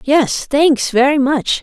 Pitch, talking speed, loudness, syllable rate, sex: 275 Hz, 150 wpm, -14 LUFS, 3.3 syllables/s, female